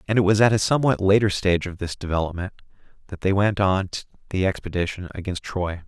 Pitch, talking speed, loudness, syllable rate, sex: 95 Hz, 195 wpm, -22 LUFS, 6.4 syllables/s, male